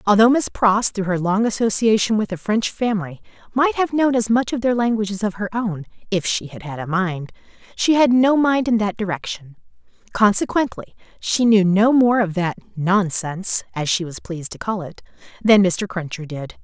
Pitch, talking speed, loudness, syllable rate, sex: 205 Hz, 200 wpm, -19 LUFS, 4.8 syllables/s, female